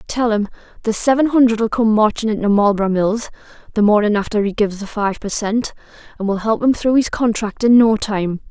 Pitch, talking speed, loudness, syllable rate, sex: 215 Hz, 205 wpm, -17 LUFS, 5.7 syllables/s, female